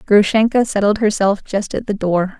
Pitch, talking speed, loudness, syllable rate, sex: 205 Hz, 175 wpm, -16 LUFS, 4.9 syllables/s, female